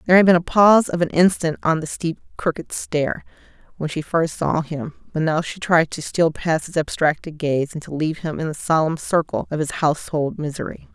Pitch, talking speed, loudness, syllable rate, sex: 160 Hz, 220 wpm, -20 LUFS, 5.3 syllables/s, female